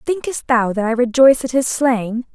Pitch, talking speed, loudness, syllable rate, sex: 250 Hz, 205 wpm, -16 LUFS, 5.1 syllables/s, female